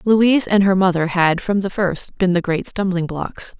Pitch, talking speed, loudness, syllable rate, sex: 190 Hz, 215 wpm, -18 LUFS, 4.6 syllables/s, female